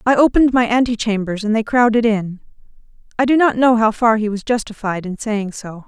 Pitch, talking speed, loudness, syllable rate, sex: 225 Hz, 205 wpm, -16 LUFS, 5.6 syllables/s, female